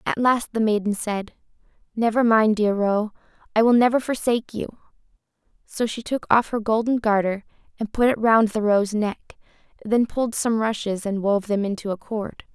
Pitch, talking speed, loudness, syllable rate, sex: 220 Hz, 180 wpm, -22 LUFS, 5.0 syllables/s, female